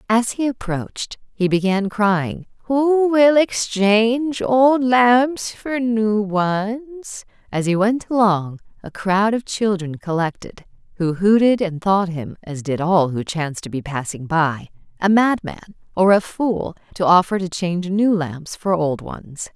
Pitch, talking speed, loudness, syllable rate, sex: 200 Hz, 155 wpm, -19 LUFS, 3.8 syllables/s, female